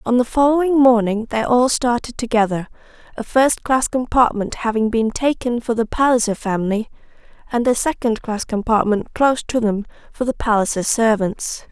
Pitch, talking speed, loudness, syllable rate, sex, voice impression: 235 Hz, 155 wpm, -18 LUFS, 5.1 syllables/s, female, slightly feminine, young, slightly muffled, cute, slightly friendly, slightly kind